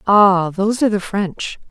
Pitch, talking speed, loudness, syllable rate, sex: 195 Hz, 175 wpm, -16 LUFS, 4.7 syllables/s, female